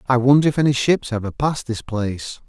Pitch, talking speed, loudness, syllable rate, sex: 125 Hz, 220 wpm, -19 LUFS, 5.8 syllables/s, male